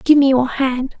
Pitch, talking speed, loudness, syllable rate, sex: 265 Hz, 240 wpm, -16 LUFS, 4.5 syllables/s, female